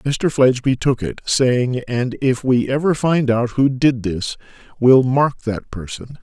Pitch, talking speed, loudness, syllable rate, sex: 125 Hz, 175 wpm, -17 LUFS, 4.0 syllables/s, male